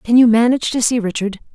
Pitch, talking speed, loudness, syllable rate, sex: 230 Hz, 230 wpm, -15 LUFS, 6.9 syllables/s, female